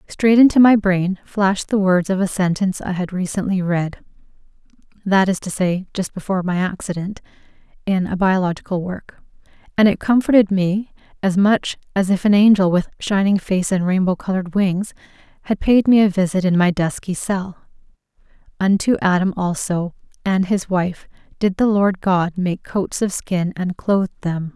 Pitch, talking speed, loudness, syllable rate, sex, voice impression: 190 Hz, 165 wpm, -18 LUFS, 4.9 syllables/s, female, feminine, adult-like, slightly relaxed, weak, bright, soft, fluent, intellectual, calm, friendly, reassuring, elegant, lively, kind, modest